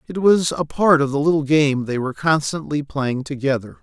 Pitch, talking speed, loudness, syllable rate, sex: 145 Hz, 205 wpm, -19 LUFS, 5.3 syllables/s, male